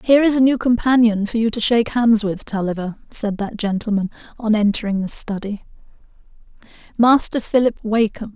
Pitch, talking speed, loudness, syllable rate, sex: 220 Hz, 150 wpm, -18 LUFS, 5.6 syllables/s, female